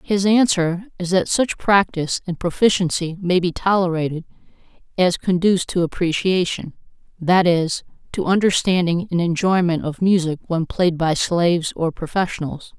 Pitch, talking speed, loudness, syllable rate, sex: 175 Hz, 135 wpm, -19 LUFS, 4.9 syllables/s, female